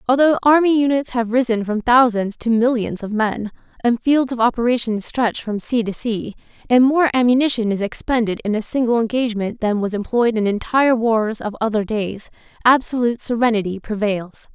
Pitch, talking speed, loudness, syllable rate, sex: 230 Hz, 170 wpm, -18 LUFS, 5.3 syllables/s, female